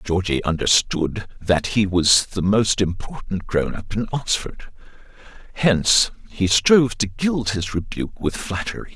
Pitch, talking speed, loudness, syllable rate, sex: 105 Hz, 140 wpm, -20 LUFS, 4.3 syllables/s, male